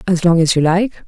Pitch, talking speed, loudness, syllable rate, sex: 175 Hz, 280 wpm, -14 LUFS, 6.2 syllables/s, female